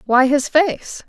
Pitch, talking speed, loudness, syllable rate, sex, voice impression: 280 Hz, 165 wpm, -16 LUFS, 3.3 syllables/s, female, very feminine, slightly young, slightly adult-like, thin, slightly tensed, slightly weak, slightly dark, hard, clear, fluent, slightly cute, cool, intellectual, refreshing, slightly sincere, slightly calm, friendly, reassuring, slightly unique, slightly elegant, slightly sweet, slightly lively, slightly strict, slightly sharp